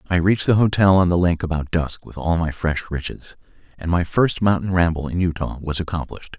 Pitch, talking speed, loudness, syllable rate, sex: 85 Hz, 215 wpm, -20 LUFS, 5.7 syllables/s, male